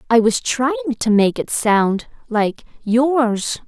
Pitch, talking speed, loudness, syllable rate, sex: 235 Hz, 130 wpm, -18 LUFS, 3.2 syllables/s, female